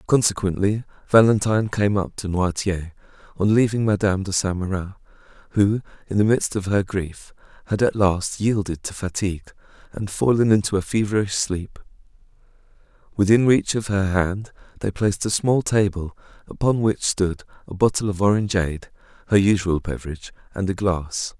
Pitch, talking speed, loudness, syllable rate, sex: 100 Hz, 150 wpm, -21 LUFS, 5.2 syllables/s, male